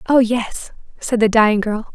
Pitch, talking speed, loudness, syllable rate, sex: 225 Hz, 185 wpm, -17 LUFS, 4.6 syllables/s, female